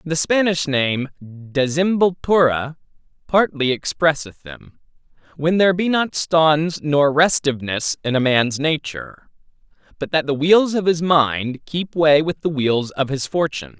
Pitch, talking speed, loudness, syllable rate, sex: 150 Hz, 145 wpm, -18 LUFS, 4.3 syllables/s, male